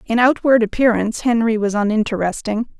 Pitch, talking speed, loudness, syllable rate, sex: 225 Hz, 130 wpm, -17 LUFS, 5.8 syllables/s, female